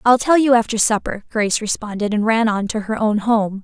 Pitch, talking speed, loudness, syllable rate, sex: 220 Hz, 230 wpm, -18 LUFS, 5.5 syllables/s, female